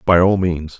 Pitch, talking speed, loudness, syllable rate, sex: 90 Hz, 230 wpm, -16 LUFS, 4.5 syllables/s, male